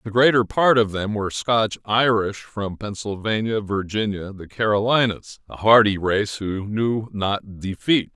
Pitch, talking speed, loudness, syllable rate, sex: 105 Hz, 140 wpm, -21 LUFS, 4.3 syllables/s, male